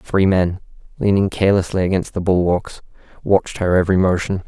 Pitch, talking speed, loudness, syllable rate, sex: 95 Hz, 145 wpm, -18 LUFS, 5.8 syllables/s, male